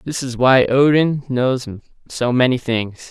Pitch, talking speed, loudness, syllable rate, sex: 130 Hz, 155 wpm, -17 LUFS, 4.0 syllables/s, male